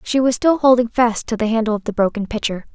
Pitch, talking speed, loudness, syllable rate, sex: 230 Hz, 260 wpm, -18 LUFS, 6.2 syllables/s, female